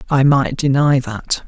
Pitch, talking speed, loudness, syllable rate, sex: 135 Hz, 165 wpm, -16 LUFS, 3.9 syllables/s, male